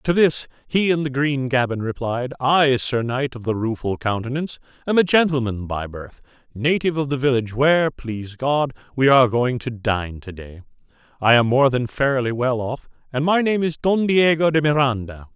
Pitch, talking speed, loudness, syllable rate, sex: 130 Hz, 190 wpm, -20 LUFS, 5.1 syllables/s, male